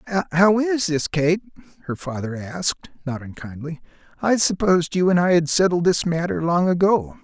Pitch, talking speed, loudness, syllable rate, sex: 165 Hz, 165 wpm, -20 LUFS, 5.3 syllables/s, male